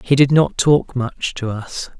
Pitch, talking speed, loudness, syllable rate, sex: 130 Hz, 210 wpm, -17 LUFS, 3.8 syllables/s, male